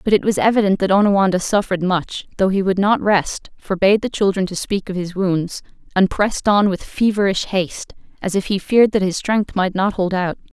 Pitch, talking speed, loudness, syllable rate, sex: 195 Hz, 215 wpm, -18 LUFS, 5.6 syllables/s, female